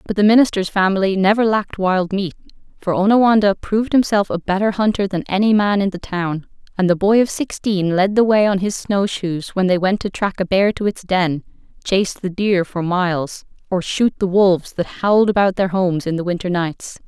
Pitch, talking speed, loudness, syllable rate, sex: 195 Hz, 215 wpm, -17 LUFS, 5.4 syllables/s, female